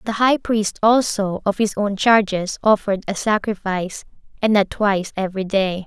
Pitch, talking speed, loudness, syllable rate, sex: 205 Hz, 165 wpm, -19 LUFS, 5.0 syllables/s, female